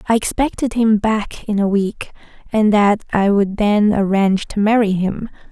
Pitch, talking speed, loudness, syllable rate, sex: 210 Hz, 175 wpm, -16 LUFS, 4.5 syllables/s, female